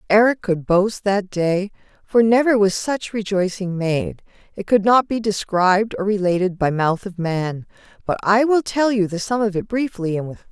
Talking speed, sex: 205 wpm, female